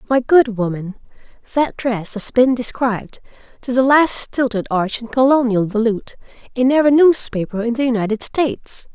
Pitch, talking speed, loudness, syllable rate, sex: 240 Hz, 155 wpm, -17 LUFS, 5.2 syllables/s, female